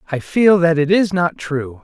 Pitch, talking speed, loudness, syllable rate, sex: 160 Hz, 230 wpm, -16 LUFS, 4.4 syllables/s, male